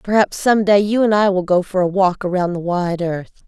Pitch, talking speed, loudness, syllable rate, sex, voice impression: 190 Hz, 260 wpm, -17 LUFS, 4.9 syllables/s, female, feminine, adult-like, tensed, powerful, bright, clear, fluent, intellectual, calm, friendly, reassuring, elegant, lively, slightly sharp